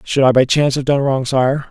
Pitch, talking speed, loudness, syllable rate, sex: 135 Hz, 280 wpm, -15 LUFS, 5.7 syllables/s, male